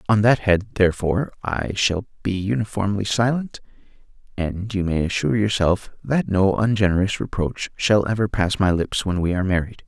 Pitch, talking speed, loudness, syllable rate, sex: 100 Hz, 165 wpm, -21 LUFS, 5.2 syllables/s, male